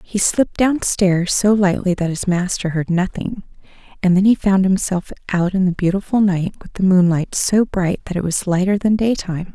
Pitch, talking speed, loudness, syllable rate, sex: 190 Hz, 195 wpm, -17 LUFS, 5.0 syllables/s, female